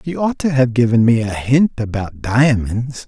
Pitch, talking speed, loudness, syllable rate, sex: 125 Hz, 195 wpm, -16 LUFS, 4.4 syllables/s, male